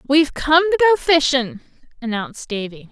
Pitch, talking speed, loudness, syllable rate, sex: 275 Hz, 145 wpm, -17 LUFS, 5.6 syllables/s, female